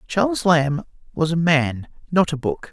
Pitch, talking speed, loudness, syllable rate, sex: 155 Hz, 175 wpm, -20 LUFS, 4.4 syllables/s, male